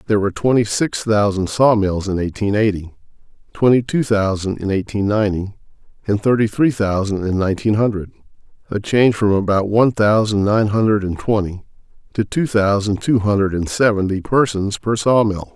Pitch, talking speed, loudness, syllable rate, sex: 105 Hz, 160 wpm, -17 LUFS, 5.4 syllables/s, male